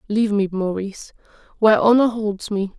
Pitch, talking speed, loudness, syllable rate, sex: 210 Hz, 150 wpm, -19 LUFS, 5.7 syllables/s, female